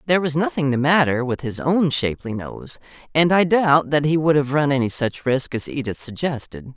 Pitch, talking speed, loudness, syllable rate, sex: 140 Hz, 215 wpm, -20 LUFS, 5.3 syllables/s, female